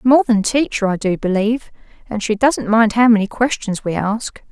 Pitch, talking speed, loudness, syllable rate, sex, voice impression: 220 Hz, 200 wpm, -17 LUFS, 5.0 syllables/s, female, very feminine, slightly young, adult-like, very thin, slightly tensed, weak, very bright, soft, very clear, fluent, very cute, intellectual, very refreshing, sincere, very calm, very friendly, very reassuring, very unique, very elegant, slightly wild, very sweet, lively, very kind, slightly intense, slightly sharp, modest, very light